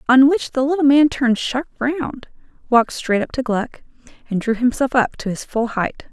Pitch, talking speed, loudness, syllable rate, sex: 255 Hz, 205 wpm, -18 LUFS, 5.0 syllables/s, female